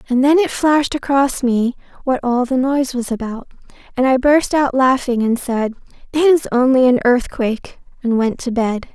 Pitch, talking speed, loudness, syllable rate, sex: 255 Hz, 190 wpm, -16 LUFS, 5.0 syllables/s, female